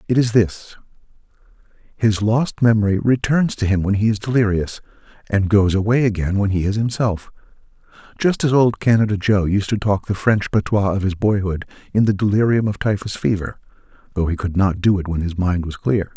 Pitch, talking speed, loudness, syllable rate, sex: 105 Hz, 195 wpm, -18 LUFS, 5.4 syllables/s, male